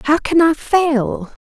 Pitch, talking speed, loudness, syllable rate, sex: 300 Hz, 170 wpm, -15 LUFS, 3.3 syllables/s, female